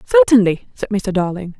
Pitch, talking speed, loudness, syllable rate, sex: 215 Hz, 150 wpm, -16 LUFS, 4.9 syllables/s, female